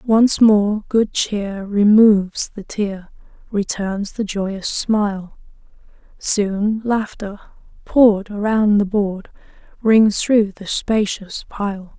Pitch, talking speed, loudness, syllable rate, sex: 205 Hz, 110 wpm, -18 LUFS, 3.1 syllables/s, female